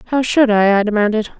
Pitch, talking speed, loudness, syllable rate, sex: 220 Hz, 215 wpm, -14 LUFS, 5.4 syllables/s, female